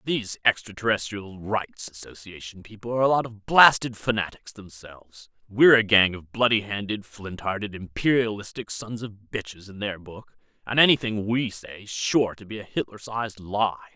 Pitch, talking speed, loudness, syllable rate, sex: 105 Hz, 165 wpm, -24 LUFS, 5.1 syllables/s, male